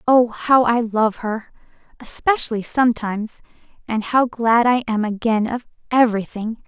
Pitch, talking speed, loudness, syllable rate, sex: 230 Hz, 135 wpm, -19 LUFS, 4.7 syllables/s, female